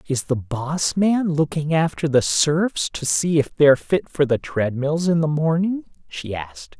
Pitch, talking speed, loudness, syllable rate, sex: 150 Hz, 185 wpm, -20 LUFS, 4.3 syllables/s, male